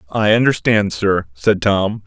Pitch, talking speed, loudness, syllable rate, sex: 100 Hz, 145 wpm, -16 LUFS, 4.0 syllables/s, male